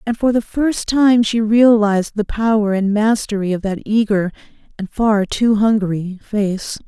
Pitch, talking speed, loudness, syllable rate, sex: 215 Hz, 165 wpm, -16 LUFS, 4.3 syllables/s, female